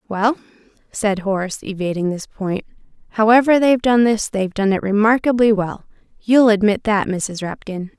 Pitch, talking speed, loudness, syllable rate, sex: 210 Hz, 145 wpm, -17 LUFS, 5.2 syllables/s, female